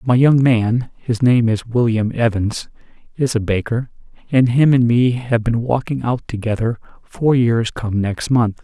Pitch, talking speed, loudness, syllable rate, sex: 120 Hz, 175 wpm, -17 LUFS, 4.2 syllables/s, male